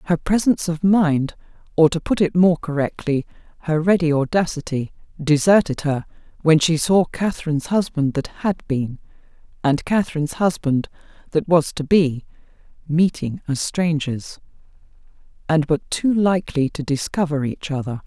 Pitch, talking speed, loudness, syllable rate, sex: 160 Hz, 130 wpm, -20 LUFS, 4.8 syllables/s, female